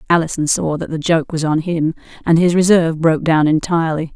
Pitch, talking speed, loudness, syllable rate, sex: 160 Hz, 200 wpm, -16 LUFS, 6.0 syllables/s, female